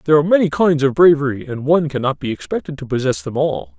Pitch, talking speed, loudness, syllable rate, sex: 140 Hz, 240 wpm, -17 LUFS, 6.9 syllables/s, male